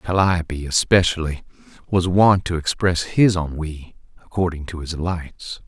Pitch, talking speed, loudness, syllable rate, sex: 85 Hz, 125 wpm, -20 LUFS, 4.4 syllables/s, male